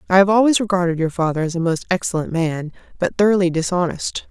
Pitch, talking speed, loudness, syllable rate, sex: 180 Hz, 195 wpm, -19 LUFS, 6.3 syllables/s, female